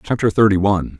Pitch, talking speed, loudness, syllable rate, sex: 100 Hz, 180 wpm, -16 LUFS, 7.1 syllables/s, male